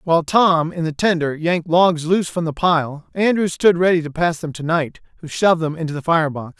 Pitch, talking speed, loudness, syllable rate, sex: 165 Hz, 235 wpm, -18 LUFS, 5.5 syllables/s, male